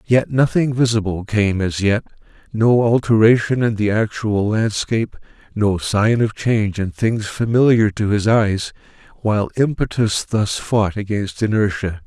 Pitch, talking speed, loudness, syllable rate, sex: 105 Hz, 140 wpm, -18 LUFS, 4.4 syllables/s, male